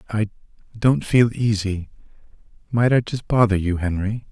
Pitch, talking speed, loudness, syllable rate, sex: 110 Hz, 125 wpm, -21 LUFS, 4.6 syllables/s, male